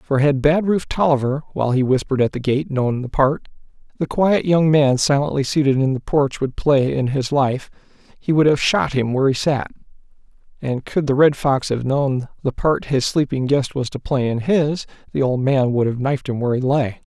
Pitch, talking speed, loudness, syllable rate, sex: 135 Hz, 220 wpm, -19 LUFS, 5.3 syllables/s, male